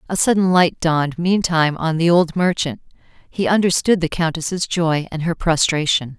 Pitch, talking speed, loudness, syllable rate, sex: 165 Hz, 165 wpm, -18 LUFS, 4.9 syllables/s, female